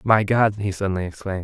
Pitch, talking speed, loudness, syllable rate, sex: 100 Hz, 210 wpm, -21 LUFS, 6.5 syllables/s, male